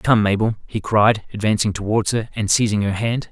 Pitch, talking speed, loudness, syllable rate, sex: 105 Hz, 200 wpm, -19 LUFS, 5.2 syllables/s, male